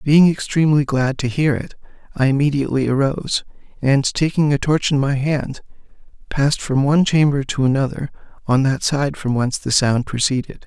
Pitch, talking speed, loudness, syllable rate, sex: 140 Hz, 170 wpm, -18 LUFS, 5.4 syllables/s, male